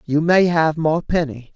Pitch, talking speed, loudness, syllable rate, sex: 160 Hz, 195 wpm, -18 LUFS, 4.2 syllables/s, male